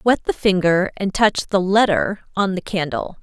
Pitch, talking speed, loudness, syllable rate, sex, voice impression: 190 Hz, 185 wpm, -19 LUFS, 4.9 syllables/s, female, feminine, adult-like, tensed, powerful, bright, clear, intellectual, calm, elegant, lively, slightly strict, slightly sharp